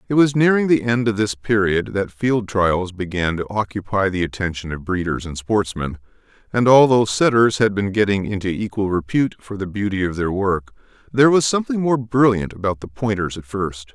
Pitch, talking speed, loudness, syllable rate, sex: 105 Hz, 195 wpm, -19 LUFS, 5.4 syllables/s, male